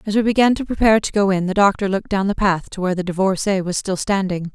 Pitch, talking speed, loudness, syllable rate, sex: 195 Hz, 275 wpm, -18 LUFS, 6.8 syllables/s, female